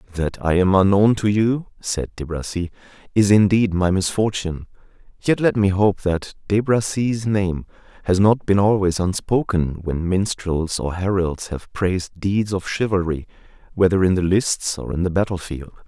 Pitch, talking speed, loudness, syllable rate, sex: 95 Hz, 165 wpm, -20 LUFS, 4.6 syllables/s, male